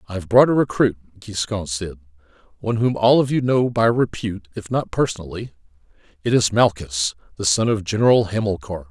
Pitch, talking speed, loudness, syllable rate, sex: 100 Hz, 175 wpm, -20 LUFS, 5.7 syllables/s, male